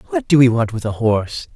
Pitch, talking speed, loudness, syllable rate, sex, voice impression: 130 Hz, 270 wpm, -16 LUFS, 6.2 syllables/s, male, very masculine, very middle-aged, thick, very tensed, powerful, bright, slightly soft, clear, fluent, cool, intellectual, very refreshing, sincere, slightly calm, friendly, reassuring, slightly unique, slightly elegant, slightly wild, slightly sweet, lively, kind, slightly intense